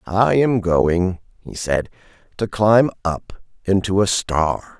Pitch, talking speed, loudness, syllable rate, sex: 95 Hz, 140 wpm, -19 LUFS, 3.3 syllables/s, male